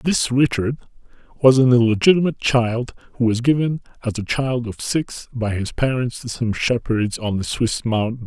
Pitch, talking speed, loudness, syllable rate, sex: 120 Hz, 175 wpm, -20 LUFS, 4.8 syllables/s, male